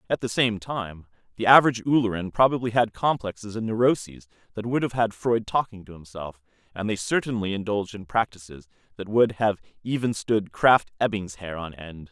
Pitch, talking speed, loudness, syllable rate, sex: 105 Hz, 180 wpm, -24 LUFS, 5.5 syllables/s, male